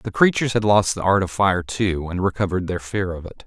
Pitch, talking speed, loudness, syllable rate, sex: 95 Hz, 260 wpm, -20 LUFS, 5.8 syllables/s, male